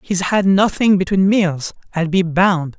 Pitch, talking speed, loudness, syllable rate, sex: 185 Hz, 170 wpm, -16 LUFS, 4.1 syllables/s, male